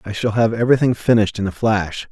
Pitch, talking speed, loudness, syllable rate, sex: 110 Hz, 225 wpm, -17 LUFS, 6.5 syllables/s, male